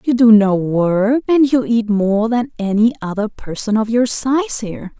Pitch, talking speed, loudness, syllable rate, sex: 225 Hz, 190 wpm, -16 LUFS, 4.4 syllables/s, female